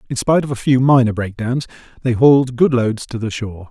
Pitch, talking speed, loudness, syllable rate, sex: 125 Hz, 225 wpm, -16 LUFS, 6.1 syllables/s, male